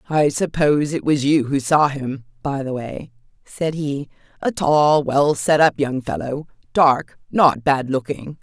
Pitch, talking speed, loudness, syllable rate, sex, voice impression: 140 Hz, 150 wpm, -19 LUFS, 4.0 syllables/s, female, feminine, adult-like, slightly clear, intellectual, slightly calm, slightly elegant